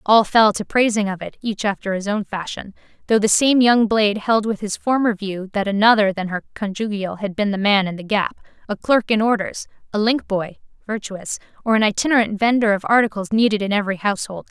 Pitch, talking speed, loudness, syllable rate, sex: 210 Hz, 205 wpm, -19 LUFS, 5.8 syllables/s, female